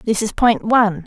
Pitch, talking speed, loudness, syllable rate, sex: 215 Hz, 225 wpm, -16 LUFS, 4.9 syllables/s, female